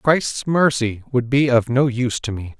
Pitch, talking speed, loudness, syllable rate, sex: 125 Hz, 210 wpm, -19 LUFS, 4.5 syllables/s, male